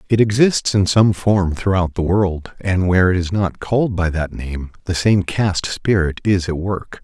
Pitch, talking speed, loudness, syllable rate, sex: 95 Hz, 205 wpm, -18 LUFS, 4.6 syllables/s, male